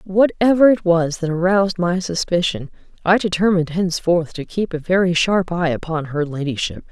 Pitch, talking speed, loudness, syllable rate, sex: 175 Hz, 165 wpm, -18 LUFS, 5.3 syllables/s, female